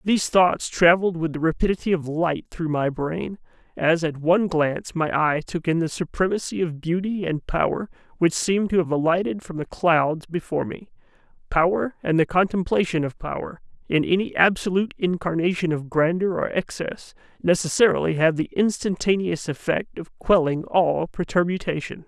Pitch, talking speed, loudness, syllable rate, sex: 170 Hz, 160 wpm, -22 LUFS, 5.1 syllables/s, male